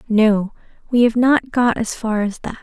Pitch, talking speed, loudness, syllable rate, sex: 225 Hz, 205 wpm, -17 LUFS, 4.4 syllables/s, female